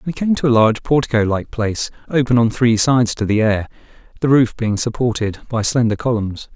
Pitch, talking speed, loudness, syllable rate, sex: 115 Hz, 200 wpm, -17 LUFS, 5.7 syllables/s, male